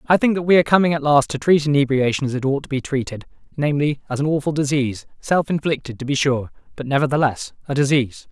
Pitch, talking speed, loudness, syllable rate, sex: 140 Hz, 225 wpm, -19 LUFS, 6.7 syllables/s, male